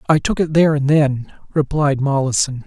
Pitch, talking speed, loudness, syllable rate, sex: 145 Hz, 180 wpm, -17 LUFS, 5.2 syllables/s, male